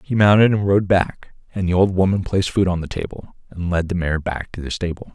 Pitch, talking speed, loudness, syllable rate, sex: 95 Hz, 255 wpm, -19 LUFS, 5.7 syllables/s, male